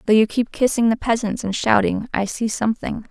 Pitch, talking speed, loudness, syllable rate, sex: 220 Hz, 215 wpm, -20 LUFS, 5.5 syllables/s, female